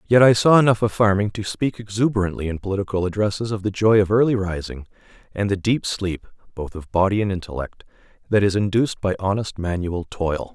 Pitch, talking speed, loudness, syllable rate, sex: 100 Hz, 195 wpm, -21 LUFS, 5.9 syllables/s, male